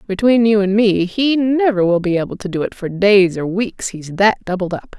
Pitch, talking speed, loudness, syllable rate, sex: 200 Hz, 240 wpm, -16 LUFS, 5.0 syllables/s, female